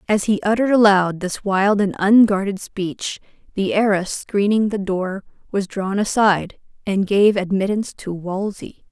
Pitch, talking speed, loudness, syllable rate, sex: 200 Hz, 150 wpm, -19 LUFS, 4.5 syllables/s, female